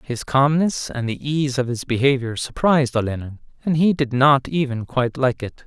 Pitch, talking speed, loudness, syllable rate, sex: 130 Hz, 190 wpm, -20 LUFS, 5.1 syllables/s, male